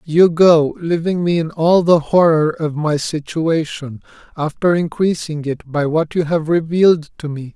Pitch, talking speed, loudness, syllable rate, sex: 160 Hz, 165 wpm, -16 LUFS, 4.3 syllables/s, male